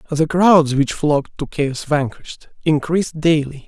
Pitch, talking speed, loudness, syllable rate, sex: 150 Hz, 145 wpm, -17 LUFS, 4.5 syllables/s, male